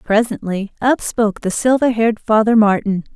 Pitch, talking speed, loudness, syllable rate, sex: 220 Hz, 150 wpm, -16 LUFS, 5.2 syllables/s, female